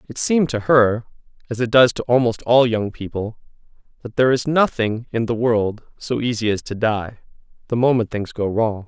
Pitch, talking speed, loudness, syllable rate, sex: 115 Hz, 195 wpm, -19 LUFS, 5.2 syllables/s, male